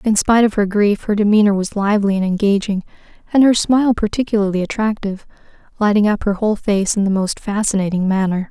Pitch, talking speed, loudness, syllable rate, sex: 205 Hz, 185 wpm, -16 LUFS, 6.3 syllables/s, female